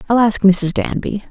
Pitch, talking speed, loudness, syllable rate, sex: 205 Hz, 185 wpm, -15 LUFS, 4.6 syllables/s, female